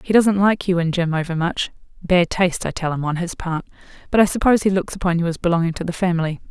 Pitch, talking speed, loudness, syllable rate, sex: 175 Hz, 240 wpm, -20 LUFS, 6.6 syllables/s, female